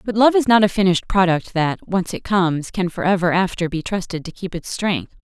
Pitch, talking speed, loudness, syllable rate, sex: 185 Hz, 230 wpm, -19 LUFS, 5.6 syllables/s, female